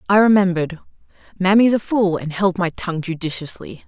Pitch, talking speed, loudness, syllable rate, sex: 185 Hz, 155 wpm, -18 LUFS, 5.8 syllables/s, female